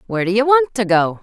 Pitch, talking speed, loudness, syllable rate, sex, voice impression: 225 Hz, 295 wpm, -16 LUFS, 6.5 syllables/s, female, slightly masculine, feminine, very gender-neutral, very adult-like, middle-aged, slightly thin, very tensed, powerful, very bright, very hard, very clear, very fluent, cool, slightly intellectual, refreshing, slightly sincere, slightly calm, slightly friendly, slightly reassuring, very unique, slightly elegant, wild, very lively, strict, intense, sharp